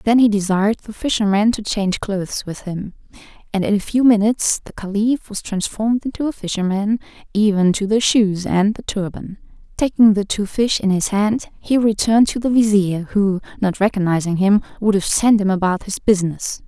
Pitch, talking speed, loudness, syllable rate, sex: 205 Hz, 185 wpm, -18 LUFS, 5.3 syllables/s, female